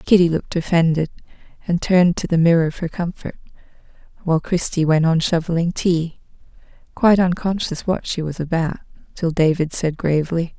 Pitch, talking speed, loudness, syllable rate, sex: 170 Hz, 145 wpm, -19 LUFS, 5.6 syllables/s, female